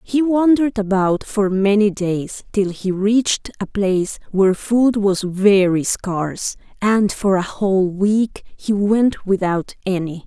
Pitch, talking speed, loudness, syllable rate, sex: 200 Hz, 145 wpm, -18 LUFS, 3.9 syllables/s, female